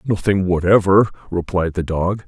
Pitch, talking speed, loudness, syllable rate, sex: 95 Hz, 130 wpm, -17 LUFS, 4.7 syllables/s, male